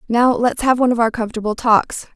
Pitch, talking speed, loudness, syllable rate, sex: 235 Hz, 225 wpm, -17 LUFS, 6.3 syllables/s, female